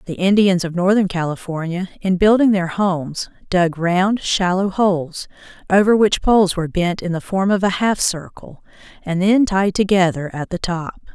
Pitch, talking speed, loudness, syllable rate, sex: 185 Hz, 170 wpm, -17 LUFS, 4.8 syllables/s, female